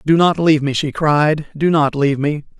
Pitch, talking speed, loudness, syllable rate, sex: 150 Hz, 210 wpm, -16 LUFS, 5.3 syllables/s, male